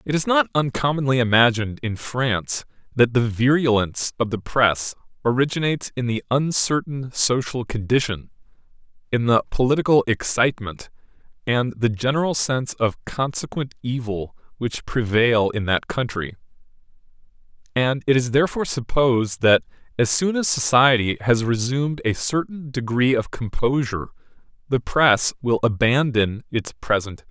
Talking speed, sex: 130 wpm, male